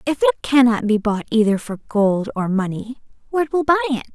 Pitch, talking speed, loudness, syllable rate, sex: 245 Hz, 205 wpm, -19 LUFS, 5.2 syllables/s, female